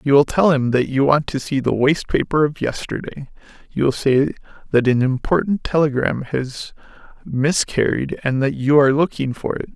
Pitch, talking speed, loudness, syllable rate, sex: 140 Hz, 185 wpm, -19 LUFS, 5.0 syllables/s, male